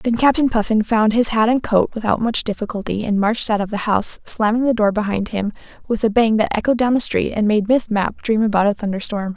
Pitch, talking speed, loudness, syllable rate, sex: 215 Hz, 245 wpm, -18 LUFS, 5.8 syllables/s, female